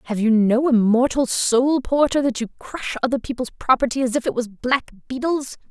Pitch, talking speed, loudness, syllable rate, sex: 250 Hz, 180 wpm, -20 LUFS, 5.0 syllables/s, female